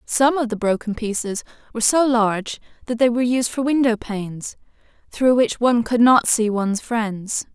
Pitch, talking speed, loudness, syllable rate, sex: 230 Hz, 175 wpm, -19 LUFS, 5.1 syllables/s, female